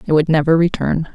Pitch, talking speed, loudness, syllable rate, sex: 160 Hz, 210 wpm, -16 LUFS, 6.0 syllables/s, female